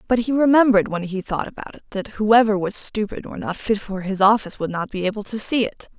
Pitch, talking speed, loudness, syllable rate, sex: 210 Hz, 250 wpm, -20 LUFS, 6.0 syllables/s, female